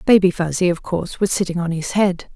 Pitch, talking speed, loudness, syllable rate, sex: 180 Hz, 230 wpm, -19 LUFS, 5.9 syllables/s, female